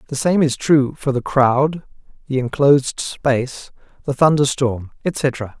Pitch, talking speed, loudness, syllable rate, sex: 135 Hz, 150 wpm, -18 LUFS, 4.1 syllables/s, male